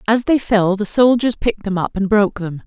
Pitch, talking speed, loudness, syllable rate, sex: 210 Hz, 250 wpm, -16 LUFS, 5.6 syllables/s, female